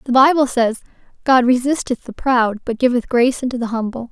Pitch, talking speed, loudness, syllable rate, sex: 250 Hz, 190 wpm, -17 LUFS, 5.8 syllables/s, female